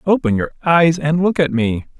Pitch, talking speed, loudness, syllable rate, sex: 155 Hz, 210 wpm, -16 LUFS, 4.9 syllables/s, male